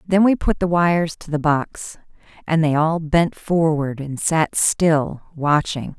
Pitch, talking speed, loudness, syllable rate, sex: 160 Hz, 170 wpm, -19 LUFS, 3.8 syllables/s, female